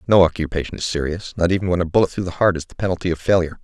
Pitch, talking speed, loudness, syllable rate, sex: 85 Hz, 280 wpm, -20 LUFS, 7.9 syllables/s, male